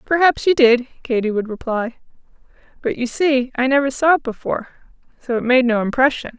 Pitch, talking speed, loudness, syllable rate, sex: 255 Hz, 180 wpm, -18 LUFS, 5.7 syllables/s, female